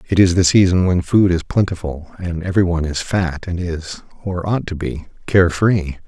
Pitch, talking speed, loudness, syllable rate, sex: 90 Hz, 210 wpm, -18 LUFS, 5.0 syllables/s, male